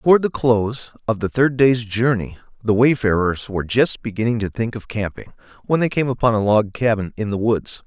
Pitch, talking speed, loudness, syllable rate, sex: 115 Hz, 205 wpm, -19 LUFS, 5.4 syllables/s, male